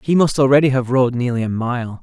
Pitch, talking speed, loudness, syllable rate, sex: 130 Hz, 235 wpm, -17 LUFS, 6.2 syllables/s, male